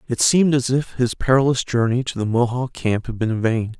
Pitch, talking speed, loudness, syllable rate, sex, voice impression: 125 Hz, 235 wpm, -19 LUFS, 5.5 syllables/s, male, very masculine, middle-aged, very thick, slightly tensed, slightly powerful, slightly dark, soft, slightly clear, fluent, slightly raspy, cool, very intellectual, refreshing, sincere, very calm, mature, very friendly, very reassuring, slightly unique, slightly elegant, wild, very sweet, lively, kind, modest